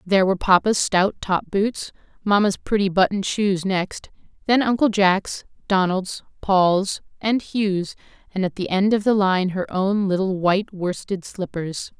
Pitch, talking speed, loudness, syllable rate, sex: 195 Hz, 155 wpm, -21 LUFS, 4.4 syllables/s, female